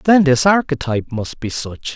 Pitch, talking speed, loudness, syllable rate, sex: 140 Hz, 185 wpm, -17 LUFS, 5.1 syllables/s, male